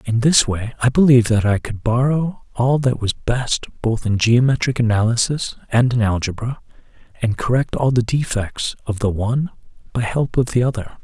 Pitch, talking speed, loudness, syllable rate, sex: 120 Hz, 180 wpm, -18 LUFS, 5.1 syllables/s, male